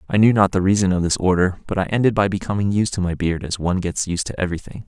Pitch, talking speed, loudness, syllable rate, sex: 95 Hz, 285 wpm, -20 LUFS, 6.9 syllables/s, male